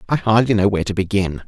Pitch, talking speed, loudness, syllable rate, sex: 100 Hz, 245 wpm, -18 LUFS, 6.9 syllables/s, male